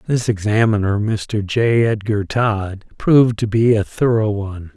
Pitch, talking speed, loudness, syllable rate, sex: 110 Hz, 150 wpm, -17 LUFS, 4.3 syllables/s, male